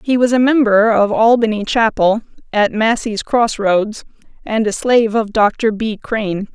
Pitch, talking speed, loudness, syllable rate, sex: 220 Hz, 165 wpm, -15 LUFS, 4.3 syllables/s, female